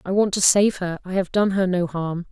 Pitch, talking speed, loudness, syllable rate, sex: 185 Hz, 285 wpm, -21 LUFS, 5.1 syllables/s, female